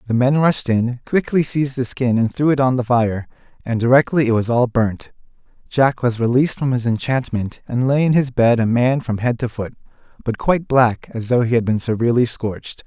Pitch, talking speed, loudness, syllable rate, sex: 125 Hz, 220 wpm, -18 LUFS, 5.4 syllables/s, male